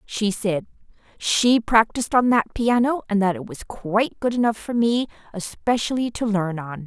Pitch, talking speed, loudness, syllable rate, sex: 220 Hz, 175 wpm, -21 LUFS, 4.8 syllables/s, female